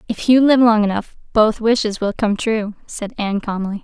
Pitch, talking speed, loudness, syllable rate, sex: 215 Hz, 205 wpm, -17 LUFS, 5.1 syllables/s, female